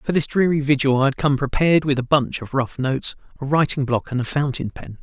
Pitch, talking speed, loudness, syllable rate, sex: 140 Hz, 250 wpm, -20 LUFS, 6.0 syllables/s, male